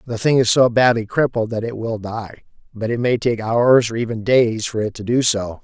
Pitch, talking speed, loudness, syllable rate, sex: 115 Hz, 245 wpm, -18 LUFS, 5.0 syllables/s, male